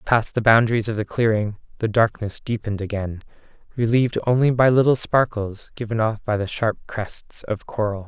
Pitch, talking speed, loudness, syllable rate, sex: 110 Hz, 170 wpm, -21 LUFS, 5.3 syllables/s, male